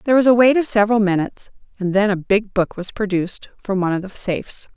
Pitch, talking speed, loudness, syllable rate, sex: 205 Hz, 240 wpm, -18 LUFS, 6.6 syllables/s, female